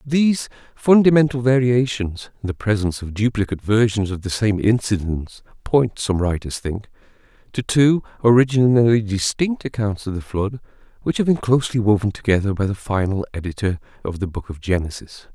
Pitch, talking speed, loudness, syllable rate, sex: 110 Hz, 155 wpm, -20 LUFS, 5.5 syllables/s, male